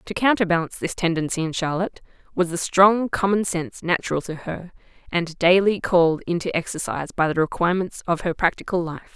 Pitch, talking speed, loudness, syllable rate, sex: 175 Hz, 170 wpm, -22 LUFS, 5.9 syllables/s, female